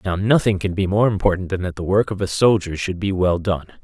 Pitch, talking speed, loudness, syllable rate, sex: 95 Hz, 265 wpm, -19 LUFS, 5.6 syllables/s, male